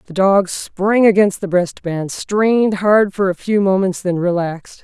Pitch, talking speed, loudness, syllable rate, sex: 190 Hz, 185 wpm, -16 LUFS, 4.3 syllables/s, female